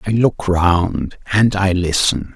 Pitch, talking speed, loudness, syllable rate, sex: 95 Hz, 155 wpm, -16 LUFS, 3.3 syllables/s, male